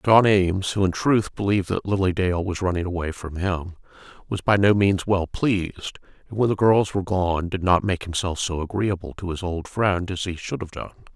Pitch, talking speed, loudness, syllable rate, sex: 95 Hz, 220 wpm, -23 LUFS, 5.2 syllables/s, male